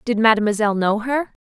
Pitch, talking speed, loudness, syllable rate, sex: 225 Hz, 165 wpm, -19 LUFS, 6.3 syllables/s, female